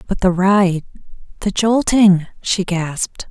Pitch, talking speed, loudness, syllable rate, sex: 190 Hz, 110 wpm, -16 LUFS, 3.8 syllables/s, female